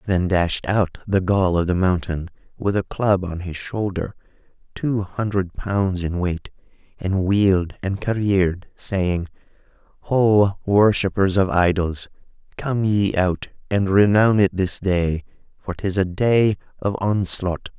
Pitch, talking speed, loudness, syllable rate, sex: 95 Hz, 140 wpm, -21 LUFS, 3.8 syllables/s, male